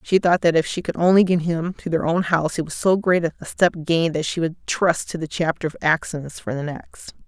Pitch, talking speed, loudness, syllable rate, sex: 165 Hz, 265 wpm, -21 LUFS, 5.6 syllables/s, female